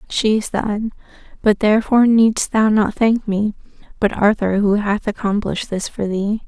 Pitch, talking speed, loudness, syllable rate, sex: 210 Hz, 165 wpm, -17 LUFS, 4.9 syllables/s, female